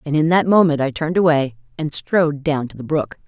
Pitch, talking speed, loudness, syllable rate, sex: 150 Hz, 240 wpm, -18 LUFS, 5.9 syllables/s, female